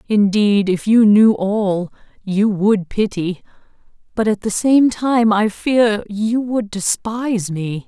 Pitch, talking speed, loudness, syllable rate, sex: 210 Hz, 145 wpm, -16 LUFS, 3.5 syllables/s, female